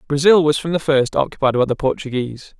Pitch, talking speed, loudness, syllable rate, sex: 145 Hz, 210 wpm, -17 LUFS, 6.2 syllables/s, male